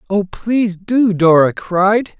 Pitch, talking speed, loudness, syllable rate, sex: 200 Hz, 135 wpm, -14 LUFS, 3.5 syllables/s, male